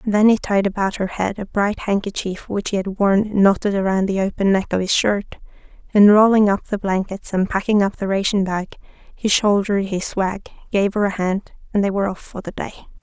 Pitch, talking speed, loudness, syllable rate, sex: 200 Hz, 215 wpm, -19 LUFS, 5.4 syllables/s, female